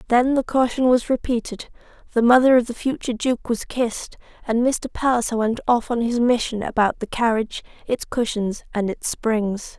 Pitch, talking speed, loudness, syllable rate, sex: 235 Hz, 180 wpm, -21 LUFS, 5.1 syllables/s, female